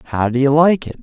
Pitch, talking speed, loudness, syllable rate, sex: 140 Hz, 295 wpm, -15 LUFS, 5.1 syllables/s, male